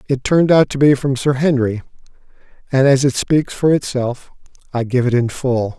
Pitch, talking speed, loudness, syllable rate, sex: 135 Hz, 195 wpm, -16 LUFS, 5.2 syllables/s, male